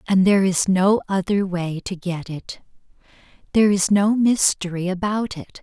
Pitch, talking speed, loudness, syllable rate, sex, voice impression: 190 Hz, 160 wpm, -20 LUFS, 4.7 syllables/s, female, very feminine, middle-aged, slightly calm, very elegant, slightly sweet, kind